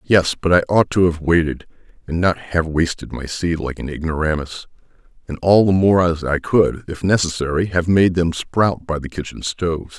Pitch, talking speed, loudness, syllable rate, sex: 85 Hz, 200 wpm, -18 LUFS, 4.9 syllables/s, male